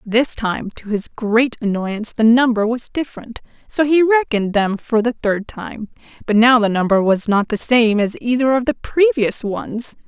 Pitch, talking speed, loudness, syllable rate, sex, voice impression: 225 Hz, 190 wpm, -17 LUFS, 4.7 syllables/s, female, feminine, adult-like, sincere, slightly friendly, elegant, sweet